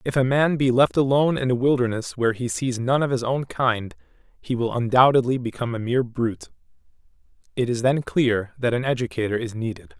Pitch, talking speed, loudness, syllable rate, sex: 125 Hz, 200 wpm, -22 LUFS, 5.9 syllables/s, male